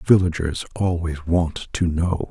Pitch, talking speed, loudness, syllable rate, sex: 85 Hz, 130 wpm, -22 LUFS, 3.9 syllables/s, male